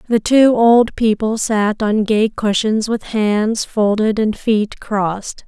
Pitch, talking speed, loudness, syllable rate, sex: 215 Hz, 155 wpm, -16 LUFS, 3.4 syllables/s, female